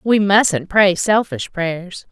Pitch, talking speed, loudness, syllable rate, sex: 190 Hz, 140 wpm, -16 LUFS, 2.9 syllables/s, female